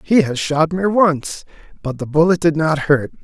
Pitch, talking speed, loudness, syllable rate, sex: 160 Hz, 205 wpm, -16 LUFS, 4.5 syllables/s, male